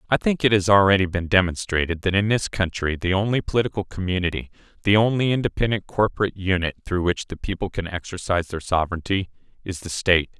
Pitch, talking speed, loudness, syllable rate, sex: 95 Hz, 175 wpm, -22 LUFS, 6.4 syllables/s, male